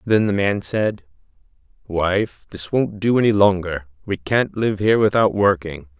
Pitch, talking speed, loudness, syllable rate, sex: 100 Hz, 160 wpm, -19 LUFS, 4.4 syllables/s, male